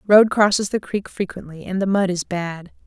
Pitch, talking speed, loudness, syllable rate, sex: 190 Hz, 210 wpm, -20 LUFS, 5.0 syllables/s, female